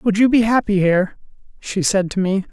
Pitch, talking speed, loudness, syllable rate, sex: 200 Hz, 215 wpm, -17 LUFS, 5.4 syllables/s, male